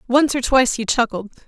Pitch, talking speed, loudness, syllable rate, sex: 245 Hz, 205 wpm, -18 LUFS, 6.0 syllables/s, female